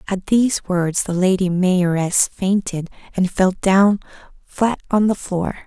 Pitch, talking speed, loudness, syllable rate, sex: 190 Hz, 150 wpm, -18 LUFS, 3.8 syllables/s, female